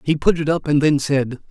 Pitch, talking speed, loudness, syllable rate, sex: 150 Hz, 280 wpm, -18 LUFS, 5.3 syllables/s, male